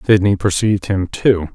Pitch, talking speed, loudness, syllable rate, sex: 100 Hz, 155 wpm, -16 LUFS, 5.0 syllables/s, male